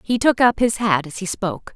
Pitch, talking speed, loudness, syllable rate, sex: 205 Hz, 275 wpm, -19 LUFS, 5.5 syllables/s, female